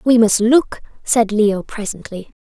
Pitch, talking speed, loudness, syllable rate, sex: 220 Hz, 150 wpm, -16 LUFS, 4.0 syllables/s, female